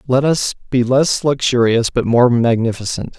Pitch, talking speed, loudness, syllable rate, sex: 125 Hz, 150 wpm, -15 LUFS, 4.5 syllables/s, male